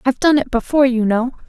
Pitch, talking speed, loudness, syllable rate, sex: 255 Hz, 245 wpm, -16 LUFS, 7.0 syllables/s, female